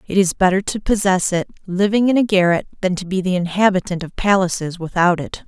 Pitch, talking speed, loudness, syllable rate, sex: 185 Hz, 210 wpm, -18 LUFS, 5.8 syllables/s, female